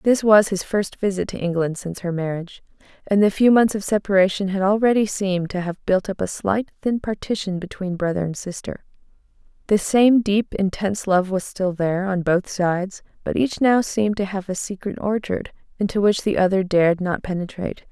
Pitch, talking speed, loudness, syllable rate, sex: 195 Hz, 195 wpm, -21 LUFS, 5.4 syllables/s, female